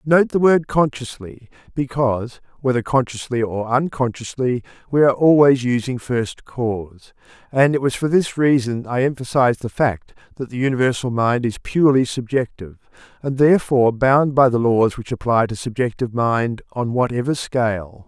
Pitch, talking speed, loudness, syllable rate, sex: 125 Hz, 155 wpm, -19 LUFS, 5.1 syllables/s, male